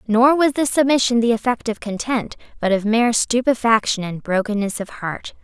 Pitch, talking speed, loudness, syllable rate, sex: 230 Hz, 175 wpm, -19 LUFS, 5.2 syllables/s, female